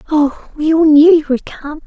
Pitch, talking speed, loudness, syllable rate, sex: 305 Hz, 225 wpm, -12 LUFS, 4.6 syllables/s, female